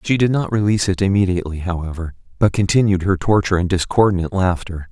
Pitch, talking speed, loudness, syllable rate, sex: 95 Hz, 170 wpm, -18 LUFS, 6.4 syllables/s, male